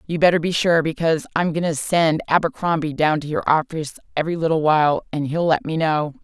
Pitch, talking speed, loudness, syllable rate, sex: 160 Hz, 210 wpm, -20 LUFS, 6.1 syllables/s, female